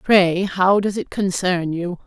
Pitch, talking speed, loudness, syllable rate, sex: 185 Hz, 175 wpm, -19 LUFS, 3.8 syllables/s, female